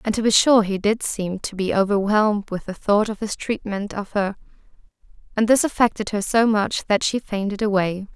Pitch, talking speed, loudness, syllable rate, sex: 205 Hz, 205 wpm, -21 LUFS, 5.1 syllables/s, female